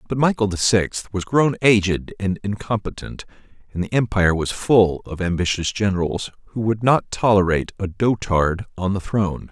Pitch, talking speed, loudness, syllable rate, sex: 100 Hz, 165 wpm, -20 LUFS, 5.1 syllables/s, male